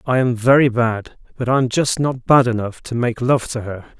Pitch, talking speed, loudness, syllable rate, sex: 120 Hz, 225 wpm, -18 LUFS, 4.8 syllables/s, male